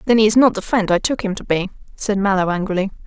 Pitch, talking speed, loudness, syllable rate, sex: 200 Hz, 275 wpm, -18 LUFS, 6.7 syllables/s, female